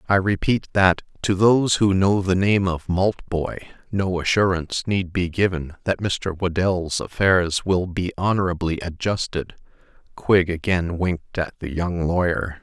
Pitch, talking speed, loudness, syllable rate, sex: 90 Hz, 145 wpm, -21 LUFS, 4.3 syllables/s, male